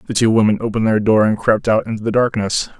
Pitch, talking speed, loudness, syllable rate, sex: 110 Hz, 255 wpm, -16 LUFS, 6.5 syllables/s, male